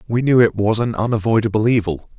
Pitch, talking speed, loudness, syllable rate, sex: 110 Hz, 190 wpm, -17 LUFS, 6.1 syllables/s, male